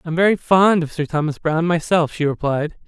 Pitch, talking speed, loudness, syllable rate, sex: 165 Hz, 210 wpm, -18 LUFS, 5.5 syllables/s, male